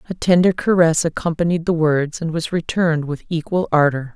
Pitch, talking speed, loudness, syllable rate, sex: 165 Hz, 175 wpm, -18 LUFS, 5.7 syllables/s, female